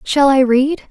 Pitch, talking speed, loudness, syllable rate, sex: 270 Hz, 200 wpm, -13 LUFS, 4.1 syllables/s, female